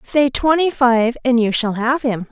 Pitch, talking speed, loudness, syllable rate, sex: 250 Hz, 205 wpm, -16 LUFS, 4.2 syllables/s, female